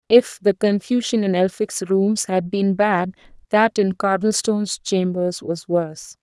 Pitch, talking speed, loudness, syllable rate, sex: 195 Hz, 145 wpm, -20 LUFS, 4.2 syllables/s, female